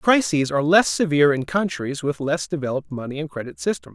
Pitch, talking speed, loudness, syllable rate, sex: 145 Hz, 200 wpm, -21 LUFS, 6.1 syllables/s, male